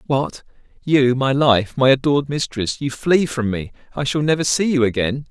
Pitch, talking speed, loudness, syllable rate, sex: 135 Hz, 190 wpm, -18 LUFS, 4.9 syllables/s, male